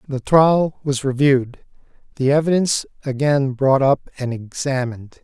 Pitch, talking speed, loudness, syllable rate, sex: 135 Hz, 125 wpm, -18 LUFS, 4.8 syllables/s, male